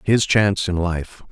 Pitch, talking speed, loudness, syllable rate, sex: 95 Hz, 180 wpm, -19 LUFS, 4.3 syllables/s, male